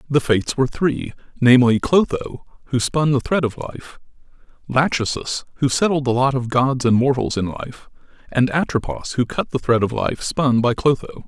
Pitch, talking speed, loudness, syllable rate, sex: 130 Hz, 180 wpm, -19 LUFS, 5.0 syllables/s, male